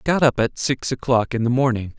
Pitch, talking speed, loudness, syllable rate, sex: 125 Hz, 270 wpm, -20 LUFS, 5.9 syllables/s, male